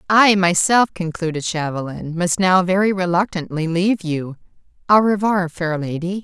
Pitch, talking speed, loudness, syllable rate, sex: 180 Hz, 135 wpm, -18 LUFS, 4.7 syllables/s, female